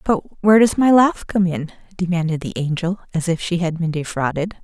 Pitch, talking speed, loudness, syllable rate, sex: 180 Hz, 205 wpm, -19 LUFS, 5.4 syllables/s, female